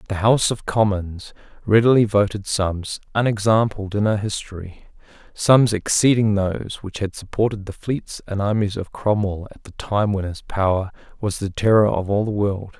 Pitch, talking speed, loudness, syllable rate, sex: 105 Hz, 170 wpm, -20 LUFS, 4.8 syllables/s, male